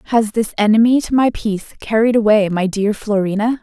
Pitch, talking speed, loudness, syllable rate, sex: 215 Hz, 180 wpm, -16 LUFS, 5.5 syllables/s, female